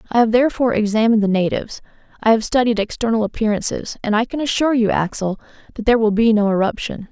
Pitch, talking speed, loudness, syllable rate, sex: 220 Hz, 195 wpm, -18 LUFS, 7.1 syllables/s, female